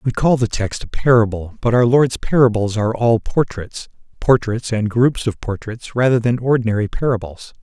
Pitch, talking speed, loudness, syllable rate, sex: 115 Hz, 165 wpm, -17 LUFS, 5.1 syllables/s, male